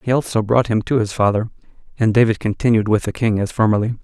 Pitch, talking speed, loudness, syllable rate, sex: 110 Hz, 225 wpm, -18 LUFS, 6.4 syllables/s, male